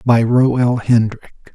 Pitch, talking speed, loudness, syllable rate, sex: 120 Hz, 155 wpm, -15 LUFS, 4.0 syllables/s, male